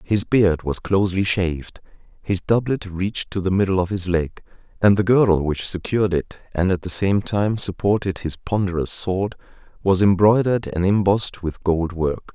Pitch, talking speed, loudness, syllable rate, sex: 95 Hz, 175 wpm, -20 LUFS, 5.0 syllables/s, male